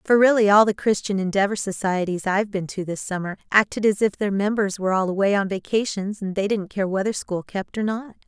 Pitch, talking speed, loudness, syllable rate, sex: 200 Hz, 225 wpm, -22 LUFS, 5.8 syllables/s, female